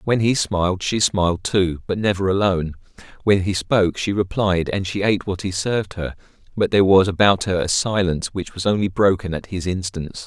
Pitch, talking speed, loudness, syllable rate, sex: 95 Hz, 205 wpm, -20 LUFS, 5.7 syllables/s, male